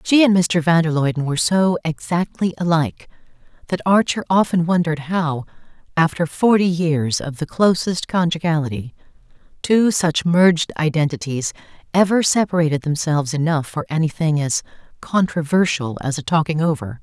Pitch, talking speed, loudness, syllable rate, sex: 165 Hz, 135 wpm, -19 LUFS, 5.2 syllables/s, female